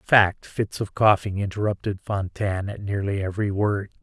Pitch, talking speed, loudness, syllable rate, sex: 100 Hz, 165 wpm, -24 LUFS, 5.4 syllables/s, male